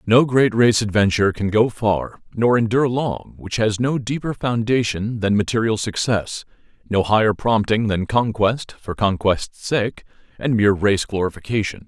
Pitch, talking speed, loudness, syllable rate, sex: 110 Hz, 150 wpm, -19 LUFS, 4.7 syllables/s, male